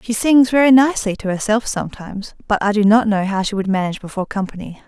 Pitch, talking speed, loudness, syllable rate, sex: 210 Hz, 220 wpm, -17 LUFS, 6.7 syllables/s, female